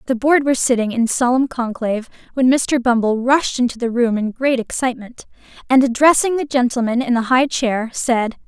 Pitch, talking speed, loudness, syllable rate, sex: 245 Hz, 185 wpm, -17 LUFS, 5.3 syllables/s, female